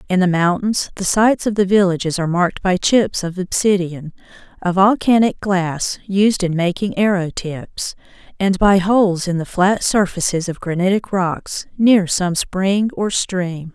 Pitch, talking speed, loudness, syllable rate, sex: 190 Hz, 160 wpm, -17 LUFS, 4.4 syllables/s, female